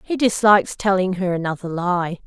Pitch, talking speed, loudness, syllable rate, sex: 190 Hz, 160 wpm, -19 LUFS, 5.2 syllables/s, female